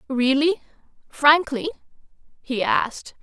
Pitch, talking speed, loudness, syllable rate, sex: 280 Hz, 75 wpm, -21 LUFS, 3.8 syllables/s, female